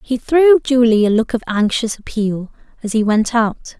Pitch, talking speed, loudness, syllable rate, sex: 230 Hz, 190 wpm, -15 LUFS, 4.5 syllables/s, female